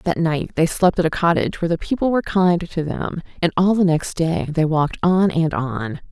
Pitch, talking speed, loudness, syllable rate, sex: 170 Hz, 235 wpm, -19 LUFS, 5.3 syllables/s, female